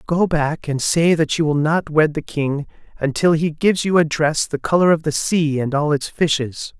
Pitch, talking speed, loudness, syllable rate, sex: 155 Hz, 230 wpm, -18 LUFS, 4.7 syllables/s, male